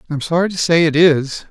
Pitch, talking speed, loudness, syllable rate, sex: 160 Hz, 280 wpm, -15 LUFS, 6.2 syllables/s, male